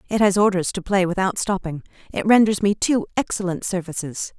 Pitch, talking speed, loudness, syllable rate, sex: 190 Hz, 180 wpm, -21 LUFS, 5.6 syllables/s, female